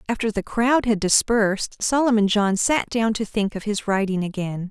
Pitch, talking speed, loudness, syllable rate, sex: 210 Hz, 190 wpm, -21 LUFS, 4.8 syllables/s, female